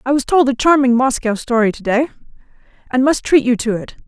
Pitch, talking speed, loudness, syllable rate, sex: 255 Hz, 205 wpm, -15 LUFS, 5.9 syllables/s, female